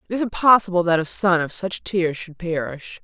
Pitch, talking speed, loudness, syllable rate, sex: 175 Hz, 215 wpm, -20 LUFS, 5.3 syllables/s, female